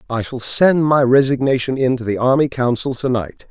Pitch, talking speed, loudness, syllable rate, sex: 130 Hz, 205 wpm, -17 LUFS, 5.1 syllables/s, male